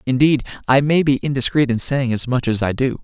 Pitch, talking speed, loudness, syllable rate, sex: 130 Hz, 235 wpm, -17 LUFS, 5.7 syllables/s, male